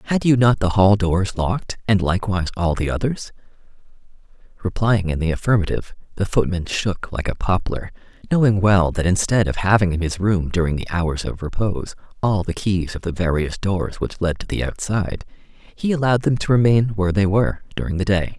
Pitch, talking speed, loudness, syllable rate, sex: 95 Hz, 195 wpm, -20 LUFS, 5.5 syllables/s, male